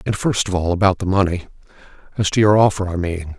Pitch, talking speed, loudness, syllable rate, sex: 95 Hz, 215 wpm, -18 LUFS, 6.2 syllables/s, male